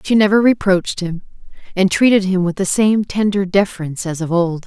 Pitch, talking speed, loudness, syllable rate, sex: 190 Hz, 195 wpm, -16 LUFS, 5.6 syllables/s, female